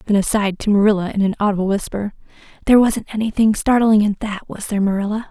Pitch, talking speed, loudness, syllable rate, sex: 205 Hz, 190 wpm, -18 LUFS, 7.1 syllables/s, female